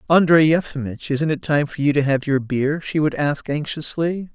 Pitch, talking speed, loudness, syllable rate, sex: 150 Hz, 205 wpm, -20 LUFS, 4.8 syllables/s, male